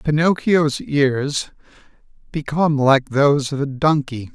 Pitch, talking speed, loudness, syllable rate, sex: 145 Hz, 110 wpm, -18 LUFS, 4.0 syllables/s, male